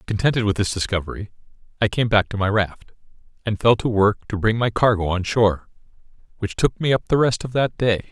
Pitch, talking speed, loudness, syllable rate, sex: 105 Hz, 215 wpm, -20 LUFS, 5.8 syllables/s, male